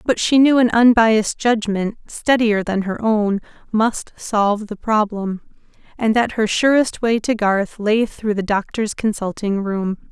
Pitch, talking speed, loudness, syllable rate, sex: 215 Hz, 160 wpm, -18 LUFS, 4.1 syllables/s, female